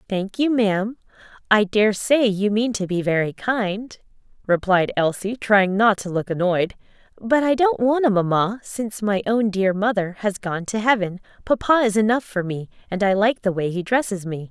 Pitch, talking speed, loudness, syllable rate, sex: 210 Hz, 190 wpm, -21 LUFS, 4.8 syllables/s, female